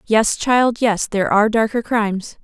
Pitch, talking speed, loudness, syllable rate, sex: 220 Hz, 170 wpm, -17 LUFS, 5.0 syllables/s, female